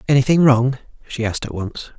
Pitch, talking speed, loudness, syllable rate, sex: 125 Hz, 180 wpm, -18 LUFS, 6.1 syllables/s, male